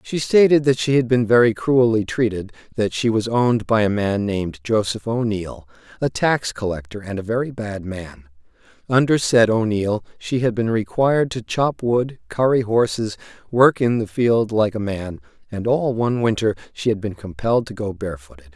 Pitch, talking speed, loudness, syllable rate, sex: 110 Hz, 185 wpm, -20 LUFS, 5.0 syllables/s, male